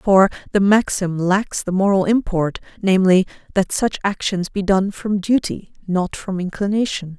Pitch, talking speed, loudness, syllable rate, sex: 195 Hz, 150 wpm, -19 LUFS, 4.6 syllables/s, female